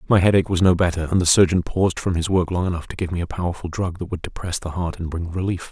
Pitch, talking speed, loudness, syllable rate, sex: 90 Hz, 295 wpm, -21 LUFS, 6.9 syllables/s, male